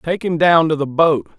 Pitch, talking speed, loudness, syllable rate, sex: 160 Hz, 260 wpm, -15 LUFS, 4.9 syllables/s, male